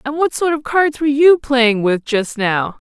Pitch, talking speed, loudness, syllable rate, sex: 265 Hz, 230 wpm, -15 LUFS, 4.4 syllables/s, female